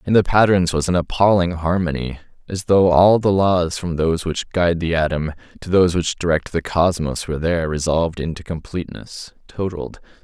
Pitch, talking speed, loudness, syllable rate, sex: 85 Hz, 165 wpm, -19 LUFS, 5.5 syllables/s, male